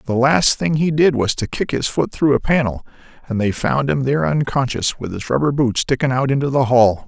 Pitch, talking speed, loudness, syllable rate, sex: 130 Hz, 235 wpm, -18 LUFS, 5.4 syllables/s, male